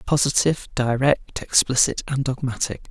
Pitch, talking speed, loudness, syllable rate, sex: 130 Hz, 105 wpm, -21 LUFS, 4.9 syllables/s, male